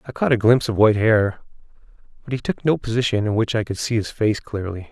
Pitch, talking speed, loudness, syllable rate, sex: 110 Hz, 245 wpm, -20 LUFS, 6.4 syllables/s, male